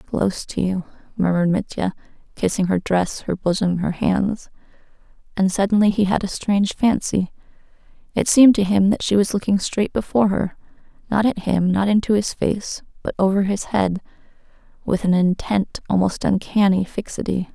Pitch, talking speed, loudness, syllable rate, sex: 195 Hz, 160 wpm, -20 LUFS, 5.2 syllables/s, female